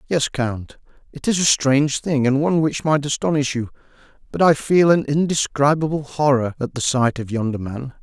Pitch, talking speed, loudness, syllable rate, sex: 140 Hz, 185 wpm, -19 LUFS, 5.2 syllables/s, male